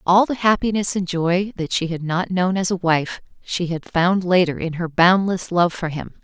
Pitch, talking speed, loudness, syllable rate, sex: 180 Hz, 220 wpm, -20 LUFS, 4.7 syllables/s, female